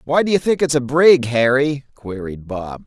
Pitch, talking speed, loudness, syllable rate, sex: 135 Hz, 190 wpm, -17 LUFS, 4.1 syllables/s, male